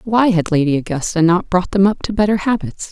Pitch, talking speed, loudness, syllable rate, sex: 185 Hz, 225 wpm, -16 LUFS, 5.7 syllables/s, female